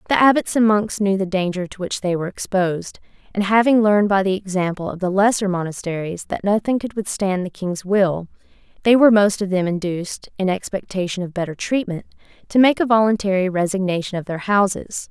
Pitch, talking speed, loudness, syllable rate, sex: 195 Hz, 190 wpm, -19 LUFS, 5.8 syllables/s, female